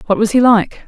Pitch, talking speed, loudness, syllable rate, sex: 215 Hz, 275 wpm, -12 LUFS, 5.6 syllables/s, female